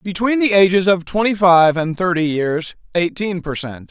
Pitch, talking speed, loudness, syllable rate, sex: 180 Hz, 185 wpm, -16 LUFS, 4.5 syllables/s, male